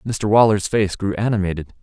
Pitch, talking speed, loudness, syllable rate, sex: 100 Hz, 165 wpm, -18 LUFS, 5.5 syllables/s, male